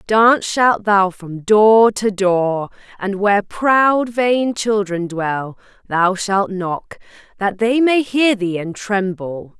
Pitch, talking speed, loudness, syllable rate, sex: 205 Hz, 145 wpm, -16 LUFS, 3.2 syllables/s, female